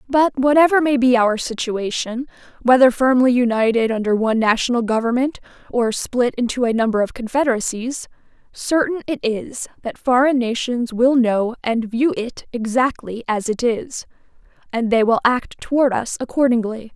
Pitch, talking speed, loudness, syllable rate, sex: 245 Hz, 150 wpm, -18 LUFS, 4.9 syllables/s, female